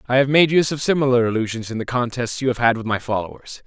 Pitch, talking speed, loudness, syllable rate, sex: 125 Hz, 260 wpm, -19 LUFS, 6.9 syllables/s, male